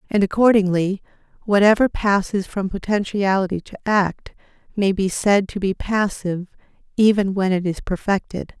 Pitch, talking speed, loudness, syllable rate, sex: 195 Hz, 135 wpm, -20 LUFS, 4.8 syllables/s, female